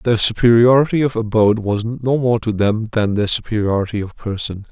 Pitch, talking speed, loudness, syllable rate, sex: 110 Hz, 180 wpm, -17 LUFS, 5.4 syllables/s, male